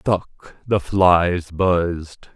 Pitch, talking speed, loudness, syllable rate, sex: 90 Hz, 100 wpm, -19 LUFS, 2.3 syllables/s, male